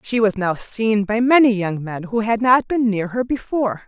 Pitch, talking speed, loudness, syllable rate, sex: 220 Hz, 230 wpm, -18 LUFS, 4.8 syllables/s, female